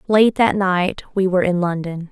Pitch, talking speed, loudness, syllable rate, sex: 185 Hz, 200 wpm, -18 LUFS, 4.9 syllables/s, female